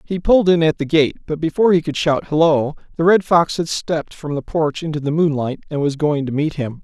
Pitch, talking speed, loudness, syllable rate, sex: 155 Hz, 255 wpm, -18 LUFS, 5.7 syllables/s, male